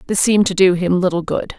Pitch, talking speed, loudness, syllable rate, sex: 185 Hz, 265 wpm, -16 LUFS, 6.5 syllables/s, female